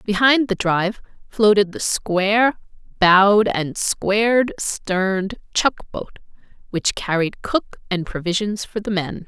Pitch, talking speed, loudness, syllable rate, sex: 200 Hz, 130 wpm, -19 LUFS, 4.1 syllables/s, female